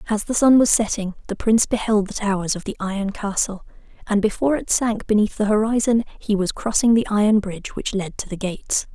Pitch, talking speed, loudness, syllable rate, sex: 210 Hz, 215 wpm, -20 LUFS, 5.9 syllables/s, female